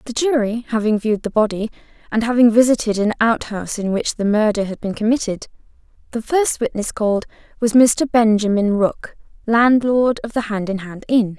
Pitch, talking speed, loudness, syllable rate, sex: 220 Hz, 175 wpm, -18 LUFS, 5.4 syllables/s, female